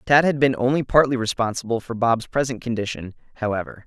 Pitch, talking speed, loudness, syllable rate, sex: 120 Hz, 170 wpm, -21 LUFS, 6.1 syllables/s, male